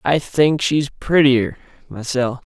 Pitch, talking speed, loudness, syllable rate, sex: 135 Hz, 120 wpm, -17 LUFS, 3.4 syllables/s, male